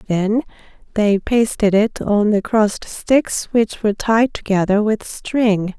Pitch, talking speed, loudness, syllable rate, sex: 215 Hz, 145 wpm, -17 LUFS, 3.8 syllables/s, female